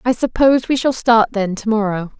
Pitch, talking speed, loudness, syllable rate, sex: 230 Hz, 220 wpm, -16 LUFS, 5.4 syllables/s, female